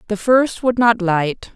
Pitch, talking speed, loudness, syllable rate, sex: 215 Hz, 195 wpm, -16 LUFS, 3.7 syllables/s, female